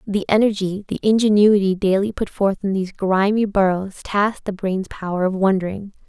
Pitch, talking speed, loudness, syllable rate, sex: 195 Hz, 170 wpm, -19 LUFS, 5.1 syllables/s, female